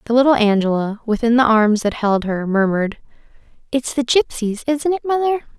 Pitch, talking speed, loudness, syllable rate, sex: 240 Hz, 170 wpm, -17 LUFS, 5.4 syllables/s, female